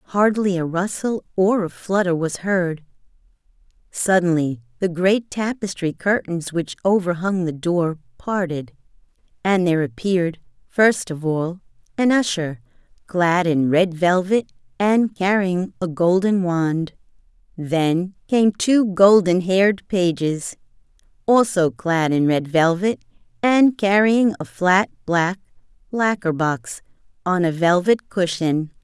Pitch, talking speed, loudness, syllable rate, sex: 180 Hz, 120 wpm, -20 LUFS, 3.8 syllables/s, female